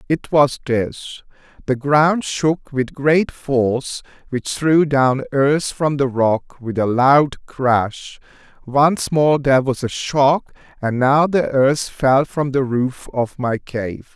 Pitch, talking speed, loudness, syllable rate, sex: 135 Hz, 145 wpm, -18 LUFS, 3.2 syllables/s, male